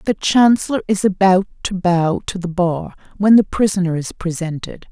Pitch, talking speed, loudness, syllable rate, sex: 185 Hz, 170 wpm, -17 LUFS, 4.9 syllables/s, female